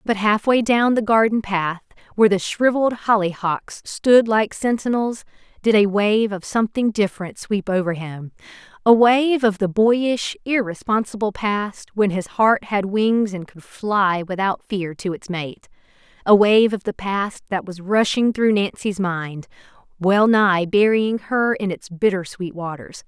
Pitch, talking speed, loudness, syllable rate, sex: 205 Hz, 160 wpm, -19 LUFS, 4.2 syllables/s, female